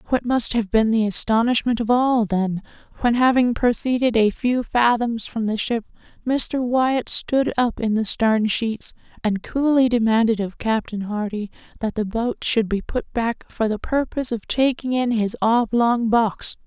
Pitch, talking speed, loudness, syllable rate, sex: 230 Hz, 175 wpm, -21 LUFS, 4.3 syllables/s, female